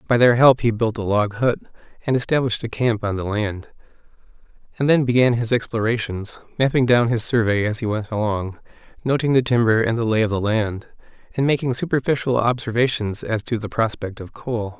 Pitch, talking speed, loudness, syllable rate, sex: 115 Hz, 190 wpm, -20 LUFS, 5.5 syllables/s, male